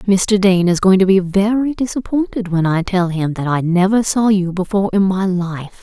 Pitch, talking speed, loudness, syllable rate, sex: 190 Hz, 215 wpm, -16 LUFS, 4.9 syllables/s, female